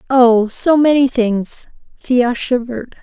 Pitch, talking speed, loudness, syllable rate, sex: 245 Hz, 100 wpm, -14 LUFS, 3.6 syllables/s, female